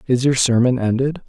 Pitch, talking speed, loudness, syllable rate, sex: 125 Hz, 190 wpm, -17 LUFS, 5.5 syllables/s, male